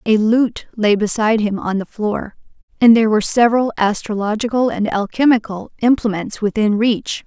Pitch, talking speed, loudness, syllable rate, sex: 220 Hz, 150 wpm, -16 LUFS, 5.2 syllables/s, female